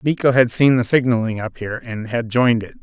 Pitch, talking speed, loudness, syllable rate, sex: 120 Hz, 235 wpm, -18 LUFS, 6.0 syllables/s, male